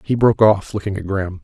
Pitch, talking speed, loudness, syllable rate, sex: 100 Hz, 250 wpm, -17 LUFS, 6.8 syllables/s, male